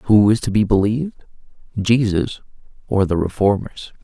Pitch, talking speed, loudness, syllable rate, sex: 105 Hz, 135 wpm, -18 LUFS, 5.0 syllables/s, male